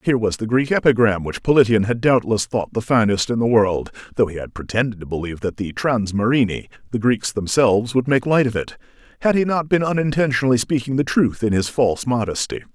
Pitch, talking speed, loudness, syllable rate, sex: 115 Hz, 205 wpm, -19 LUFS, 6.0 syllables/s, male